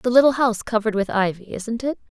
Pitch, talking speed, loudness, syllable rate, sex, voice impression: 225 Hz, 220 wpm, -21 LUFS, 6.6 syllables/s, female, feminine, adult-like, tensed, slightly bright, clear, slightly halting, friendly, reassuring, lively, kind, modest